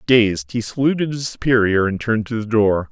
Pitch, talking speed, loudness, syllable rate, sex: 115 Hz, 205 wpm, -18 LUFS, 5.4 syllables/s, male